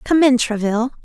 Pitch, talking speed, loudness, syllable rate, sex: 245 Hz, 175 wpm, -17 LUFS, 6.0 syllables/s, female